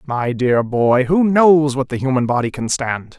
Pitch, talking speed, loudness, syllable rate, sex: 135 Hz, 205 wpm, -16 LUFS, 4.2 syllables/s, male